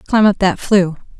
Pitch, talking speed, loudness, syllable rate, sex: 195 Hz, 200 wpm, -15 LUFS, 4.8 syllables/s, female